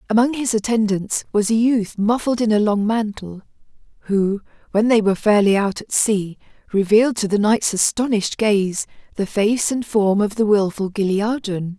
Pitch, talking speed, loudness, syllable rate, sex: 210 Hz, 170 wpm, -19 LUFS, 4.9 syllables/s, female